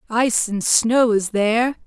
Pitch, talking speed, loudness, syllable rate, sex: 225 Hz, 160 wpm, -18 LUFS, 4.4 syllables/s, female